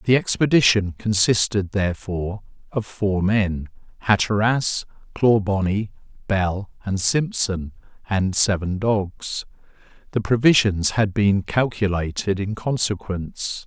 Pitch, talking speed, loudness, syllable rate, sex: 100 Hz, 95 wpm, -21 LUFS, 4.0 syllables/s, male